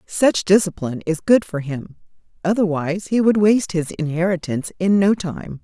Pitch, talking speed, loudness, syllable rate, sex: 180 Hz, 160 wpm, -19 LUFS, 5.4 syllables/s, female